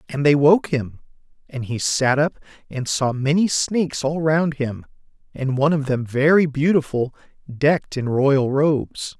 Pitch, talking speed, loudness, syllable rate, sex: 140 Hz, 165 wpm, -20 LUFS, 4.5 syllables/s, male